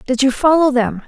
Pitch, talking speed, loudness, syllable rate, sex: 260 Hz, 225 wpm, -14 LUFS, 5.4 syllables/s, female